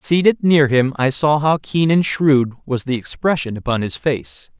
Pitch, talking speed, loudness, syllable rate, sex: 145 Hz, 195 wpm, -17 LUFS, 4.5 syllables/s, male